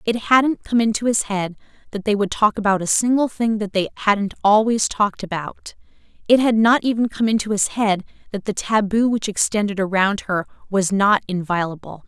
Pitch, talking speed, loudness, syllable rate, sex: 210 Hz, 190 wpm, -19 LUFS, 5.2 syllables/s, female